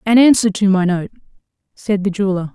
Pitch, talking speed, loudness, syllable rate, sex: 200 Hz, 190 wpm, -15 LUFS, 6.1 syllables/s, female